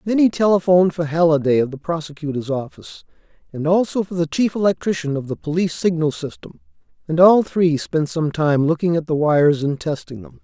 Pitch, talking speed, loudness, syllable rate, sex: 165 Hz, 190 wpm, -19 LUFS, 5.8 syllables/s, male